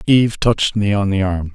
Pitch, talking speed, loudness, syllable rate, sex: 100 Hz, 235 wpm, -17 LUFS, 5.7 syllables/s, male